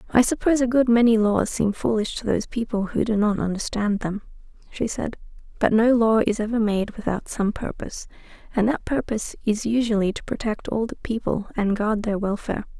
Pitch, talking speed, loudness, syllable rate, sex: 220 Hz, 190 wpm, -23 LUFS, 5.6 syllables/s, female